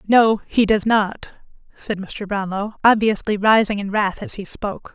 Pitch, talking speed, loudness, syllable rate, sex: 210 Hz, 170 wpm, -19 LUFS, 4.4 syllables/s, female